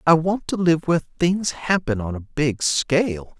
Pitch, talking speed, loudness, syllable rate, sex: 155 Hz, 195 wpm, -21 LUFS, 4.3 syllables/s, male